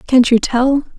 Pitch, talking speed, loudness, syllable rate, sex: 255 Hz, 185 wpm, -14 LUFS, 4.0 syllables/s, female